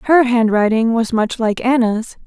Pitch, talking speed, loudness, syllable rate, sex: 230 Hz, 160 wpm, -16 LUFS, 4.4 syllables/s, female